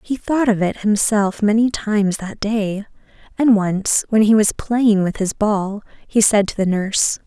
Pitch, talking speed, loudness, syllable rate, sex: 210 Hz, 190 wpm, -17 LUFS, 4.3 syllables/s, female